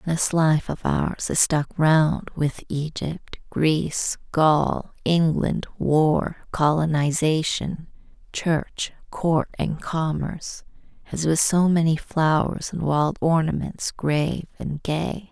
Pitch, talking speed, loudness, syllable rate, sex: 160 Hz, 115 wpm, -23 LUFS, 3.3 syllables/s, female